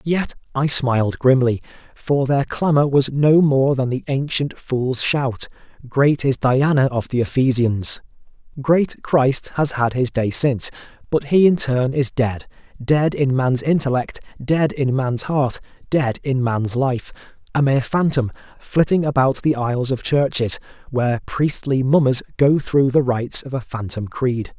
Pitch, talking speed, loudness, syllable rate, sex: 135 Hz, 160 wpm, -19 LUFS, 4.2 syllables/s, male